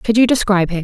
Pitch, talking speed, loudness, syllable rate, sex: 205 Hz, 285 wpm, -14 LUFS, 7.1 syllables/s, female